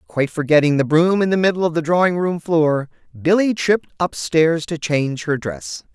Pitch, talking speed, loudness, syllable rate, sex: 160 Hz, 200 wpm, -18 LUFS, 5.2 syllables/s, male